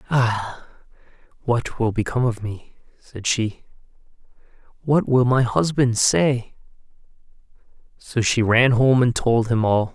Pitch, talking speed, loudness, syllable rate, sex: 120 Hz, 125 wpm, -20 LUFS, 3.9 syllables/s, male